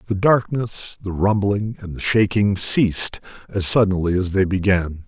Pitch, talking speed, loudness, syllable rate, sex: 100 Hz, 155 wpm, -19 LUFS, 4.5 syllables/s, male